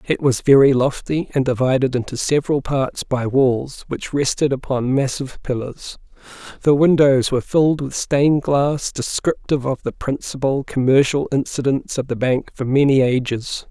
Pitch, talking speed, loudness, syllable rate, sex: 135 Hz, 155 wpm, -18 LUFS, 4.9 syllables/s, male